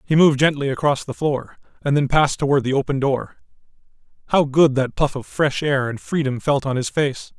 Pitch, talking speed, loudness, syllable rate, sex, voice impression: 140 Hz, 210 wpm, -20 LUFS, 5.5 syllables/s, male, masculine, adult-like, slightly powerful, slightly clear, slightly refreshing